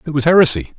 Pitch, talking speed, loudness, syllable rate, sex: 150 Hz, 230 wpm, -13 LUFS, 7.7 syllables/s, male